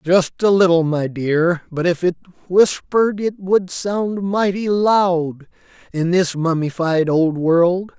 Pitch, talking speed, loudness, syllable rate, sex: 180 Hz, 145 wpm, -17 LUFS, 3.6 syllables/s, male